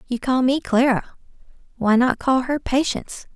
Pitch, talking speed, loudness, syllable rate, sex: 255 Hz, 160 wpm, -20 LUFS, 4.8 syllables/s, female